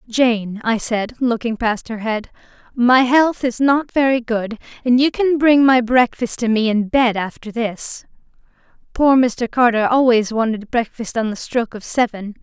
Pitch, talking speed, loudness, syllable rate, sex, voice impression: 240 Hz, 175 wpm, -17 LUFS, 4.4 syllables/s, female, gender-neutral, young, tensed, powerful, slightly soft, clear, cute, friendly, lively, slightly intense